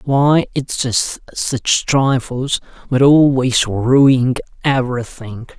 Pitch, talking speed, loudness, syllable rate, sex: 130 Hz, 95 wpm, -15 LUFS, 3.0 syllables/s, male